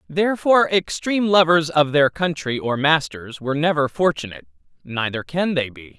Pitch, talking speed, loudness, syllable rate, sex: 155 Hz, 150 wpm, -19 LUFS, 5.3 syllables/s, male